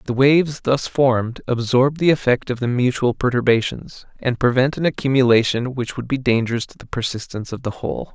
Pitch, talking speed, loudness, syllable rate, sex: 125 Hz, 185 wpm, -19 LUFS, 5.7 syllables/s, male